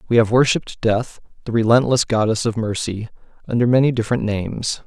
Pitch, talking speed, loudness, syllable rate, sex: 115 Hz, 160 wpm, -19 LUFS, 6.0 syllables/s, male